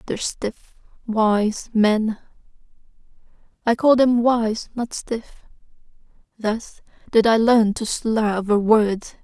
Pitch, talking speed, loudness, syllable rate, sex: 220 Hz, 110 wpm, -20 LUFS, 3.2 syllables/s, female